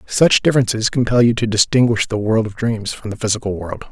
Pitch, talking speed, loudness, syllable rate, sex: 115 Hz, 215 wpm, -17 LUFS, 5.9 syllables/s, male